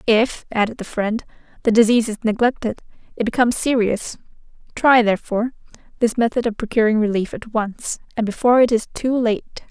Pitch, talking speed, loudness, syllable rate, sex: 225 Hz, 160 wpm, -19 LUFS, 5.8 syllables/s, female